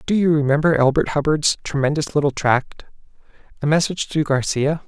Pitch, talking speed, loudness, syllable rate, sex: 150 Hz, 150 wpm, -19 LUFS, 5.6 syllables/s, male